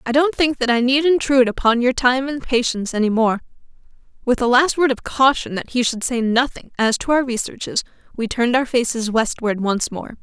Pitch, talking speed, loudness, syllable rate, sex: 250 Hz, 210 wpm, -18 LUFS, 5.5 syllables/s, female